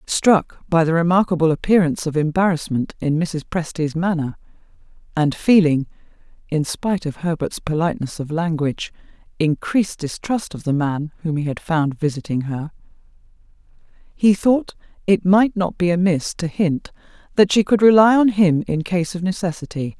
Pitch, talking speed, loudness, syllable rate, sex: 170 Hz, 145 wpm, -19 LUFS, 4.3 syllables/s, female